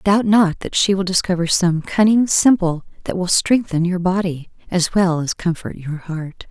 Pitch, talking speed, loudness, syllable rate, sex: 180 Hz, 185 wpm, -18 LUFS, 4.4 syllables/s, female